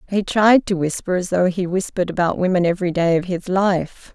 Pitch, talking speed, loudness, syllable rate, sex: 185 Hz, 215 wpm, -19 LUFS, 5.5 syllables/s, female